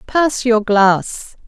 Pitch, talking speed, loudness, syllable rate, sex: 235 Hz, 120 wpm, -15 LUFS, 2.5 syllables/s, female